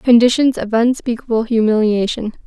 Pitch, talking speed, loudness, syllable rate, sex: 230 Hz, 95 wpm, -15 LUFS, 5.2 syllables/s, female